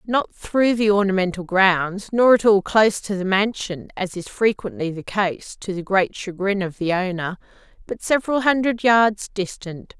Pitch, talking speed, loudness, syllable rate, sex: 200 Hz, 160 wpm, -20 LUFS, 4.6 syllables/s, female